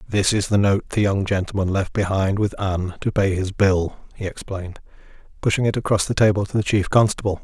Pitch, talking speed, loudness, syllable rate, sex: 100 Hz, 210 wpm, -21 LUFS, 5.6 syllables/s, male